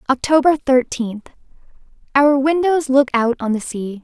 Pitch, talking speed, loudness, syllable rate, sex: 265 Hz, 120 wpm, -17 LUFS, 4.4 syllables/s, female